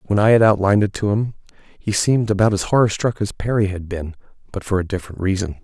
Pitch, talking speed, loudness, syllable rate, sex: 100 Hz, 235 wpm, -19 LUFS, 6.6 syllables/s, male